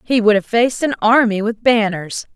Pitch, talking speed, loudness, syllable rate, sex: 220 Hz, 205 wpm, -15 LUFS, 5.1 syllables/s, female